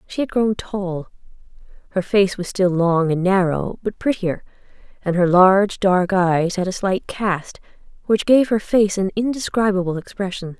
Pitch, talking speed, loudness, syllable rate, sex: 190 Hz, 165 wpm, -19 LUFS, 4.5 syllables/s, female